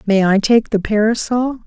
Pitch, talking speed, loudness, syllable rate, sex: 220 Hz, 180 wpm, -15 LUFS, 4.8 syllables/s, female